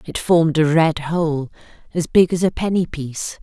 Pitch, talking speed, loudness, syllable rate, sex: 160 Hz, 195 wpm, -18 LUFS, 4.9 syllables/s, female